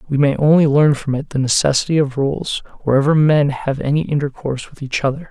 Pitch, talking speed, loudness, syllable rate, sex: 140 Hz, 205 wpm, -17 LUFS, 5.9 syllables/s, male